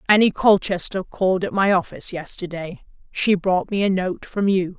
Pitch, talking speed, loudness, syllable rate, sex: 190 Hz, 175 wpm, -20 LUFS, 5.1 syllables/s, female